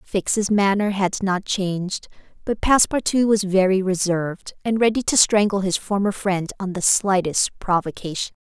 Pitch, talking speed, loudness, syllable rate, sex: 195 Hz, 150 wpm, -20 LUFS, 4.7 syllables/s, female